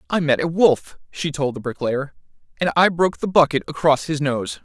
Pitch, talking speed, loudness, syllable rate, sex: 150 Hz, 205 wpm, -20 LUFS, 5.3 syllables/s, male